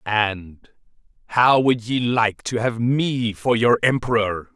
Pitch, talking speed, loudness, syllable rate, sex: 115 Hz, 130 wpm, -20 LUFS, 3.4 syllables/s, male